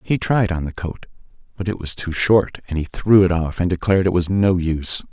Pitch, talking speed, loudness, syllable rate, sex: 90 Hz, 245 wpm, -19 LUFS, 5.4 syllables/s, male